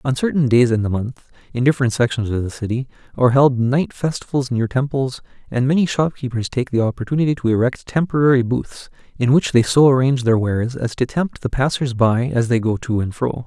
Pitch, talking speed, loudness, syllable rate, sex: 125 Hz, 210 wpm, -18 LUFS, 5.8 syllables/s, male